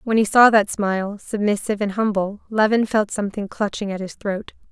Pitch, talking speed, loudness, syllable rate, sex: 205 Hz, 190 wpm, -20 LUFS, 5.5 syllables/s, female